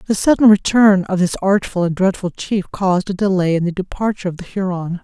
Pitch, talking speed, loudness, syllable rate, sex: 190 Hz, 215 wpm, -17 LUFS, 5.8 syllables/s, female